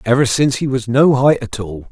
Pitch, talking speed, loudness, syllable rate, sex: 125 Hz, 220 wpm, -15 LUFS, 5.6 syllables/s, male